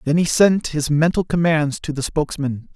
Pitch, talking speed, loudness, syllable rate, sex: 155 Hz, 195 wpm, -19 LUFS, 5.0 syllables/s, male